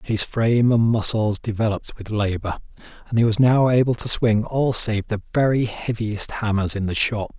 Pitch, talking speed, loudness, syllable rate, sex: 110 Hz, 185 wpm, -20 LUFS, 5.1 syllables/s, male